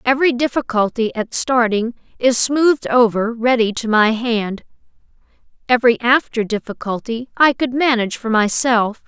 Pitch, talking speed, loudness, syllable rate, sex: 235 Hz, 125 wpm, -17 LUFS, 4.8 syllables/s, female